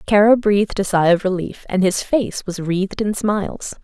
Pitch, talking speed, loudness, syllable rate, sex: 195 Hz, 205 wpm, -18 LUFS, 5.0 syllables/s, female